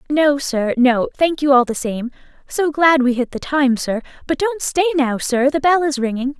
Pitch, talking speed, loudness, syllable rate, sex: 275 Hz, 225 wpm, -17 LUFS, 4.6 syllables/s, female